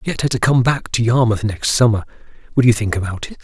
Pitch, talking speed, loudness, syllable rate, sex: 115 Hz, 280 wpm, -17 LUFS, 6.9 syllables/s, male